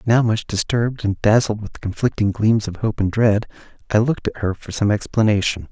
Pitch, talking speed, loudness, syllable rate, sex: 110 Hz, 200 wpm, -19 LUFS, 5.4 syllables/s, male